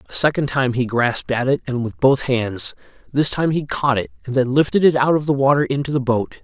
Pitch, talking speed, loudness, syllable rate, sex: 135 Hz, 250 wpm, -19 LUFS, 5.7 syllables/s, male